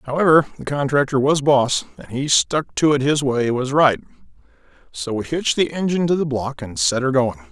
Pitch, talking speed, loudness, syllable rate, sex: 135 Hz, 210 wpm, -19 LUFS, 5.3 syllables/s, male